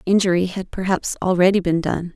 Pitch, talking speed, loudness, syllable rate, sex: 185 Hz, 165 wpm, -19 LUFS, 5.6 syllables/s, female